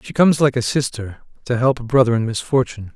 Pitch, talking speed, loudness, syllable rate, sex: 125 Hz, 225 wpm, -18 LUFS, 6.6 syllables/s, male